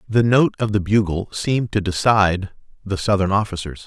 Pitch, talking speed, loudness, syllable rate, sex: 100 Hz, 170 wpm, -19 LUFS, 5.4 syllables/s, male